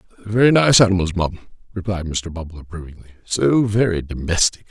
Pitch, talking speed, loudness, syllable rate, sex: 95 Hz, 140 wpm, -18 LUFS, 6.1 syllables/s, male